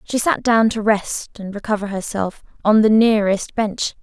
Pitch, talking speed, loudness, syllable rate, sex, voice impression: 210 Hz, 180 wpm, -18 LUFS, 4.6 syllables/s, female, very feminine, very young, very thin, very tensed, powerful, very bright, hard, very clear, slightly fluent, cute, intellectual, very refreshing, very sincere, slightly calm, very friendly, reassuring, very unique, elegant, wild, slightly sweet, very lively, strict, intense